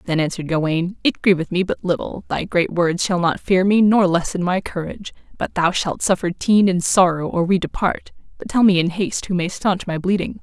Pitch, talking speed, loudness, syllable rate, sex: 180 Hz, 225 wpm, -19 LUFS, 5.5 syllables/s, female